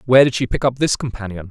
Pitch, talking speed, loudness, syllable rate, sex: 120 Hz, 280 wpm, -18 LUFS, 7.3 syllables/s, male